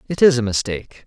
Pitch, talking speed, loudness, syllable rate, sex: 115 Hz, 225 wpm, -18 LUFS, 6.5 syllables/s, male